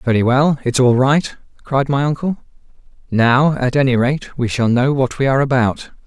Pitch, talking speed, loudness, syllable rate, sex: 135 Hz, 190 wpm, -16 LUFS, 4.9 syllables/s, male